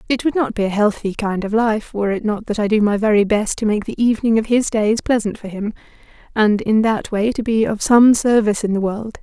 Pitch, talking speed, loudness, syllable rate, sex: 215 Hz, 260 wpm, -17 LUFS, 5.7 syllables/s, female